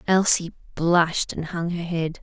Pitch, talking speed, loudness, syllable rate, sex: 170 Hz, 160 wpm, -22 LUFS, 4.4 syllables/s, female